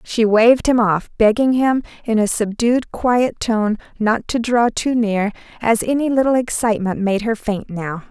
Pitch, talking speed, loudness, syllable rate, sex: 225 Hz, 180 wpm, -17 LUFS, 4.5 syllables/s, female